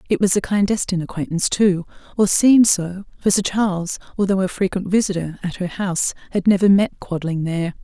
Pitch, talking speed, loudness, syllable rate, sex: 190 Hz, 185 wpm, -19 LUFS, 6.0 syllables/s, female